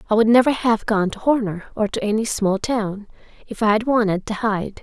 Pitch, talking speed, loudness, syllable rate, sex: 220 Hz, 225 wpm, -20 LUFS, 5.3 syllables/s, female